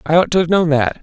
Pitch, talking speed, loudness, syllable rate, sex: 165 Hz, 350 wpm, -15 LUFS, 6.5 syllables/s, male